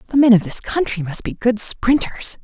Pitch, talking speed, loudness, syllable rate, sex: 225 Hz, 220 wpm, -17 LUFS, 5.1 syllables/s, female